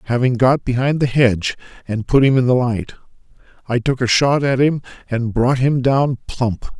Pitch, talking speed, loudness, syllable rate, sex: 125 Hz, 195 wpm, -17 LUFS, 4.8 syllables/s, male